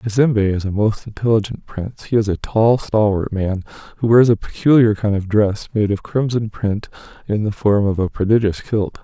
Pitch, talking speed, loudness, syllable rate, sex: 105 Hz, 200 wpm, -18 LUFS, 5.2 syllables/s, male